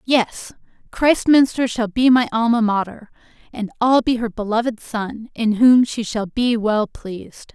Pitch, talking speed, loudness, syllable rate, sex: 230 Hz, 160 wpm, -18 LUFS, 4.2 syllables/s, female